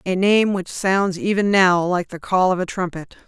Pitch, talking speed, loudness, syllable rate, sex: 185 Hz, 220 wpm, -19 LUFS, 4.6 syllables/s, female